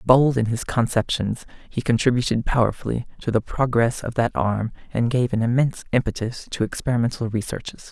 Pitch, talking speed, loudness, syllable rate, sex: 120 Hz, 160 wpm, -22 LUFS, 5.6 syllables/s, male